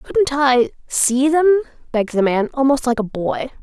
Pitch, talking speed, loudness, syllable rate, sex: 265 Hz, 180 wpm, -17 LUFS, 4.6 syllables/s, female